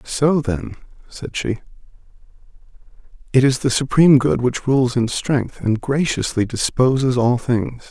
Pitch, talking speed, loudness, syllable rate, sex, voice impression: 130 Hz, 135 wpm, -18 LUFS, 4.2 syllables/s, male, very masculine, very adult-like, old, very thick, relaxed, very powerful, dark, slightly soft, muffled, fluent, raspy, very cool, intellectual, very sincere, very calm, very mature, friendly, very reassuring, very unique, slightly elegant, very wild, slightly sweet, very kind, very modest